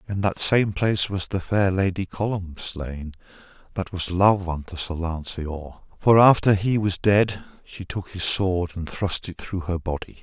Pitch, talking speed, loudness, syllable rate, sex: 95 Hz, 190 wpm, -23 LUFS, 4.5 syllables/s, male